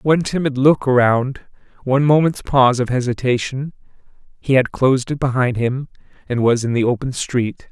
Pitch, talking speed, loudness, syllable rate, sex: 130 Hz, 150 wpm, -17 LUFS, 5.3 syllables/s, male